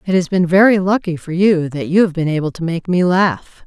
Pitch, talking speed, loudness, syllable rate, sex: 175 Hz, 260 wpm, -15 LUFS, 5.4 syllables/s, female